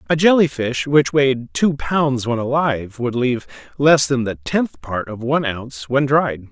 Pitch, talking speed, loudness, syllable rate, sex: 130 Hz, 195 wpm, -18 LUFS, 4.7 syllables/s, male